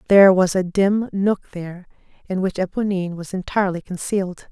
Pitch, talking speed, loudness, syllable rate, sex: 185 Hz, 160 wpm, -20 LUFS, 5.8 syllables/s, female